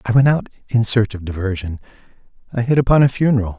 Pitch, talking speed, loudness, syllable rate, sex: 115 Hz, 200 wpm, -17 LUFS, 6.7 syllables/s, male